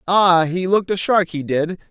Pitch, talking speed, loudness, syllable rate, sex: 180 Hz, 220 wpm, -18 LUFS, 4.9 syllables/s, male